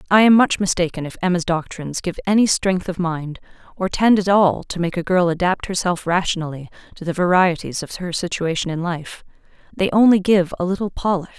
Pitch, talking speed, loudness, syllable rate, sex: 180 Hz, 190 wpm, -19 LUFS, 5.6 syllables/s, female